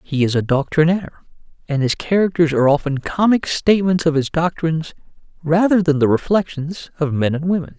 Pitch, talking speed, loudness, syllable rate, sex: 160 Hz, 170 wpm, -18 LUFS, 5.8 syllables/s, male